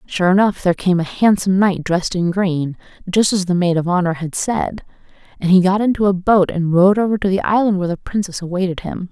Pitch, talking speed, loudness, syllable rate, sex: 185 Hz, 230 wpm, -17 LUFS, 6.0 syllables/s, female